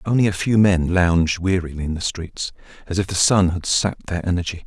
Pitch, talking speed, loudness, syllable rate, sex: 90 Hz, 220 wpm, -20 LUFS, 5.7 syllables/s, male